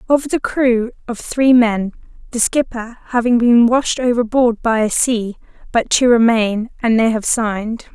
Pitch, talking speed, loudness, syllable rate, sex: 235 Hz, 165 wpm, -15 LUFS, 4.3 syllables/s, female